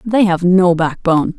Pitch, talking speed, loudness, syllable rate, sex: 180 Hz, 175 wpm, -13 LUFS, 4.7 syllables/s, female